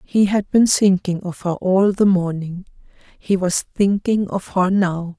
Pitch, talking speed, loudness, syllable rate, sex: 190 Hz, 175 wpm, -18 LUFS, 3.9 syllables/s, female